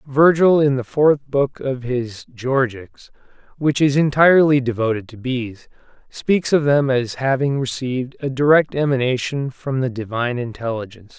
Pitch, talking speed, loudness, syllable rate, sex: 130 Hz, 145 wpm, -18 LUFS, 4.6 syllables/s, male